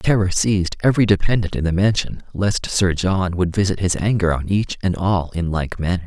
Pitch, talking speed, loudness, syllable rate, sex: 95 Hz, 210 wpm, -19 LUFS, 5.4 syllables/s, male